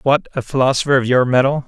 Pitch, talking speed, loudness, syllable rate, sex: 135 Hz, 215 wpm, -16 LUFS, 6.6 syllables/s, male